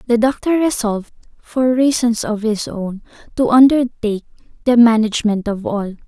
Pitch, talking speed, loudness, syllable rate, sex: 230 Hz, 140 wpm, -16 LUFS, 4.7 syllables/s, female